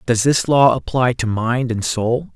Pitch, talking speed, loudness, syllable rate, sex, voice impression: 125 Hz, 205 wpm, -17 LUFS, 4.1 syllables/s, male, masculine, adult-like, tensed, slightly hard, clear, nasal, cool, slightly intellectual, calm, slightly reassuring, wild, lively, slightly modest